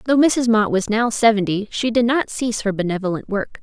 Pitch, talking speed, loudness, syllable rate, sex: 220 Hz, 215 wpm, -19 LUFS, 5.5 syllables/s, female